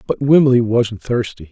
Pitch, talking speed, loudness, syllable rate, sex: 115 Hz, 160 wpm, -15 LUFS, 4.4 syllables/s, male